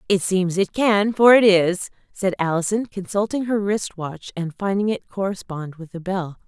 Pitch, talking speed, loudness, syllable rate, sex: 195 Hz, 175 wpm, -21 LUFS, 4.6 syllables/s, female